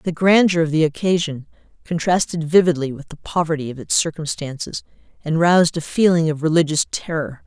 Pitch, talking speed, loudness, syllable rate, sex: 160 Hz, 160 wpm, -19 LUFS, 5.6 syllables/s, female